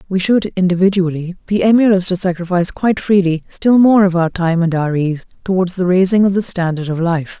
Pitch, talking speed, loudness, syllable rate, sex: 185 Hz, 205 wpm, -15 LUFS, 5.7 syllables/s, female